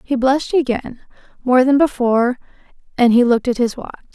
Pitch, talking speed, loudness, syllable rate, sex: 250 Hz, 175 wpm, -16 LUFS, 6.0 syllables/s, female